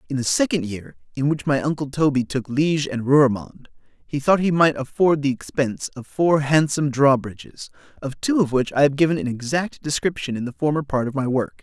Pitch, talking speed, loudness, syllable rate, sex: 140 Hz, 215 wpm, -21 LUFS, 5.7 syllables/s, male